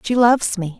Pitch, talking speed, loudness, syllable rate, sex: 215 Hz, 230 wpm, -17 LUFS, 5.8 syllables/s, female